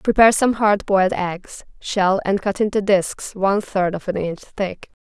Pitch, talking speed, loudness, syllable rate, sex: 195 Hz, 190 wpm, -19 LUFS, 4.4 syllables/s, female